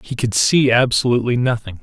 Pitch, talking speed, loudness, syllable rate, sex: 120 Hz, 165 wpm, -16 LUFS, 5.8 syllables/s, male